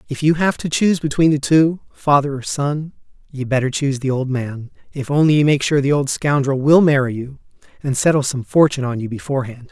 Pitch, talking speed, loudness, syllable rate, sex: 140 Hz, 215 wpm, -17 LUFS, 5.8 syllables/s, male